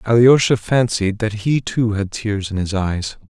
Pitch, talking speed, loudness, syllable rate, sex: 105 Hz, 180 wpm, -18 LUFS, 4.2 syllables/s, male